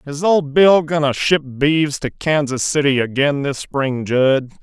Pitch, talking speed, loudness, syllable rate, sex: 145 Hz, 180 wpm, -17 LUFS, 4.1 syllables/s, male